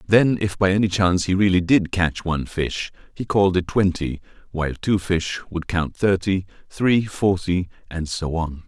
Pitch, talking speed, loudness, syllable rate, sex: 90 Hz, 180 wpm, -21 LUFS, 4.8 syllables/s, male